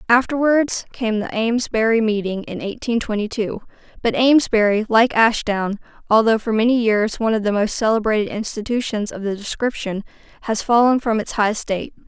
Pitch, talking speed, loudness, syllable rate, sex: 225 Hz, 160 wpm, -19 LUFS, 5.5 syllables/s, female